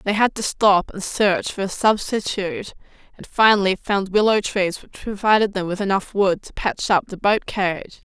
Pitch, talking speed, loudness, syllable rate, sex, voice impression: 200 Hz, 195 wpm, -20 LUFS, 5.0 syllables/s, female, very feminine, slightly young, slightly adult-like, very thin, very tensed, powerful, bright, hard, very clear, fluent, slightly raspy, slightly cute, cool, intellectual, very refreshing, sincere, calm, friendly, reassuring, very unique, slightly elegant, wild, slightly sweet, lively, strict, slightly intense, slightly sharp